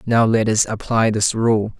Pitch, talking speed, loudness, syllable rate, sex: 110 Hz, 200 wpm, -18 LUFS, 4.3 syllables/s, male